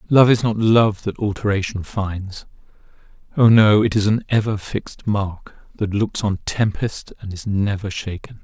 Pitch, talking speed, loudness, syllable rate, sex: 105 Hz, 165 wpm, -19 LUFS, 4.3 syllables/s, male